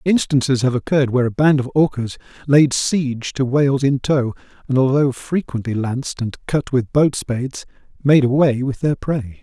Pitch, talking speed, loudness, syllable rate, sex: 135 Hz, 180 wpm, -18 LUFS, 5.1 syllables/s, male